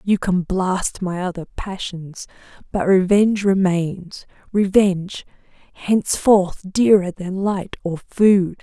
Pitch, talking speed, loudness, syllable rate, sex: 190 Hz, 105 wpm, -19 LUFS, 3.7 syllables/s, female